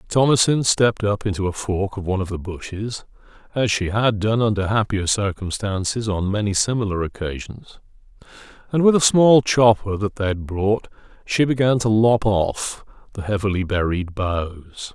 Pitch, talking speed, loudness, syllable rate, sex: 105 Hz, 160 wpm, -20 LUFS, 4.9 syllables/s, male